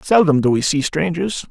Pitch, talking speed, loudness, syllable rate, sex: 160 Hz, 200 wpm, -17 LUFS, 5.0 syllables/s, male